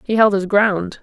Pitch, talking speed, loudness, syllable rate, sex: 200 Hz, 235 wpm, -16 LUFS, 4.4 syllables/s, female